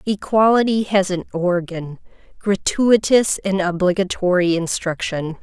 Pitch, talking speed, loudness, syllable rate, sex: 190 Hz, 90 wpm, -18 LUFS, 4.2 syllables/s, female